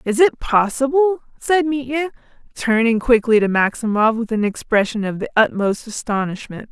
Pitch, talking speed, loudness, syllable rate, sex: 240 Hz, 145 wpm, -18 LUFS, 4.9 syllables/s, female